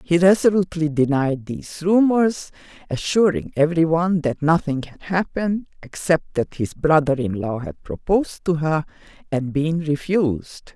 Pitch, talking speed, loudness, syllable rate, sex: 160 Hz, 135 wpm, -20 LUFS, 4.7 syllables/s, female